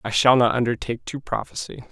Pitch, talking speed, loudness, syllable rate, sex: 120 Hz, 190 wpm, -22 LUFS, 6.1 syllables/s, male